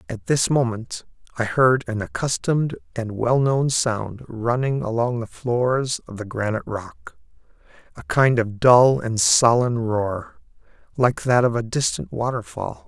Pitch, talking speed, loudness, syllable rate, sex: 115 Hz, 140 wpm, -21 LUFS, 4.1 syllables/s, male